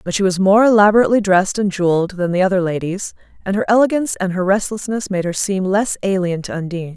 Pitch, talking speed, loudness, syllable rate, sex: 195 Hz, 215 wpm, -16 LUFS, 6.8 syllables/s, female